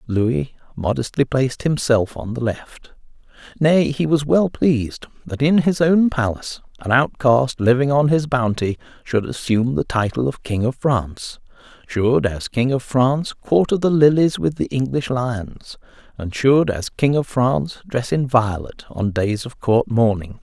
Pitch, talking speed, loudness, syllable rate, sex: 125 Hz, 165 wpm, -19 LUFS, 4.5 syllables/s, male